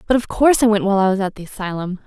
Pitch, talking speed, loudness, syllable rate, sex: 205 Hz, 320 wpm, -18 LUFS, 8.0 syllables/s, female